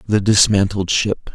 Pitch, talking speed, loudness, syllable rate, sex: 100 Hz, 135 wpm, -16 LUFS, 4.2 syllables/s, male